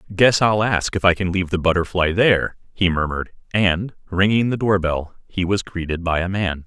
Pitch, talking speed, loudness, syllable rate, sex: 95 Hz, 200 wpm, -19 LUFS, 5.4 syllables/s, male